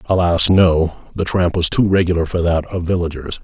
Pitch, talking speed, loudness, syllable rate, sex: 85 Hz, 190 wpm, -16 LUFS, 5.2 syllables/s, male